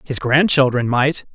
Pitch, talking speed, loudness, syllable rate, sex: 135 Hz, 135 wpm, -16 LUFS, 4.2 syllables/s, male